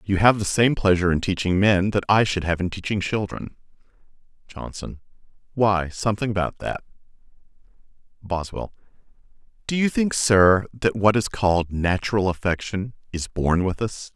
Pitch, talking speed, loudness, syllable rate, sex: 100 Hz, 150 wpm, -22 LUFS, 5.0 syllables/s, male